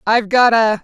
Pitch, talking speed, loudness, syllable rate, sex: 225 Hz, 215 wpm, -13 LUFS, 5.3 syllables/s, female